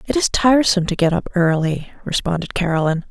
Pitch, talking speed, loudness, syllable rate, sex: 185 Hz, 175 wpm, -18 LUFS, 6.5 syllables/s, female